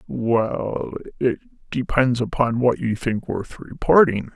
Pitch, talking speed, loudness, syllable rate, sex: 120 Hz, 125 wpm, -21 LUFS, 3.6 syllables/s, male